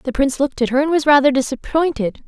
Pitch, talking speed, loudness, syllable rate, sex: 275 Hz, 235 wpm, -17 LUFS, 6.7 syllables/s, female